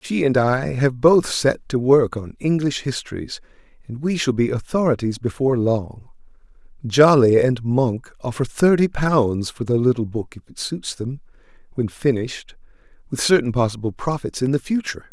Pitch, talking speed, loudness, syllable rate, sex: 130 Hz, 165 wpm, -20 LUFS, 4.9 syllables/s, male